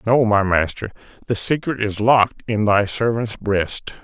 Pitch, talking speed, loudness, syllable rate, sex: 110 Hz, 165 wpm, -19 LUFS, 4.4 syllables/s, male